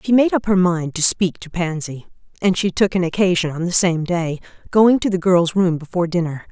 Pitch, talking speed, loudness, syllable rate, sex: 180 Hz, 230 wpm, -18 LUFS, 5.4 syllables/s, female